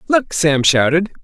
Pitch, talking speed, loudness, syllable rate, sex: 160 Hz, 145 wpm, -14 LUFS, 4.2 syllables/s, male